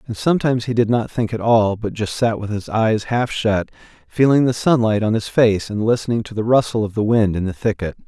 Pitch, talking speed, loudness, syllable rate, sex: 110 Hz, 245 wpm, -18 LUFS, 5.6 syllables/s, male